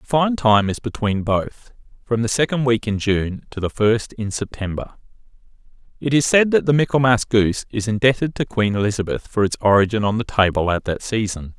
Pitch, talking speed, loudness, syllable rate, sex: 115 Hz, 195 wpm, -19 LUFS, 5.3 syllables/s, male